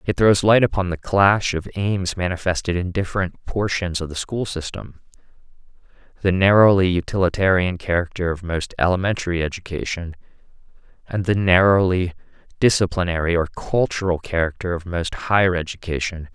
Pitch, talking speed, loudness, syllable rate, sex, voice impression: 90 Hz, 130 wpm, -20 LUFS, 5.4 syllables/s, male, masculine, adult-like, tensed, slightly dark, clear, fluent, intellectual, calm, reassuring, slightly kind, modest